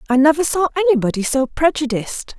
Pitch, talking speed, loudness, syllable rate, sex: 265 Hz, 150 wpm, -17 LUFS, 6.6 syllables/s, female